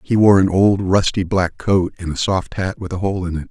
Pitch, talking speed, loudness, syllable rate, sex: 95 Hz, 275 wpm, -17 LUFS, 5.1 syllables/s, male